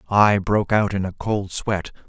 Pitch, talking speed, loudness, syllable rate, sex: 100 Hz, 200 wpm, -21 LUFS, 4.6 syllables/s, male